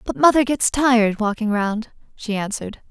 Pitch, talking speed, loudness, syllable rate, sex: 225 Hz, 165 wpm, -19 LUFS, 5.1 syllables/s, female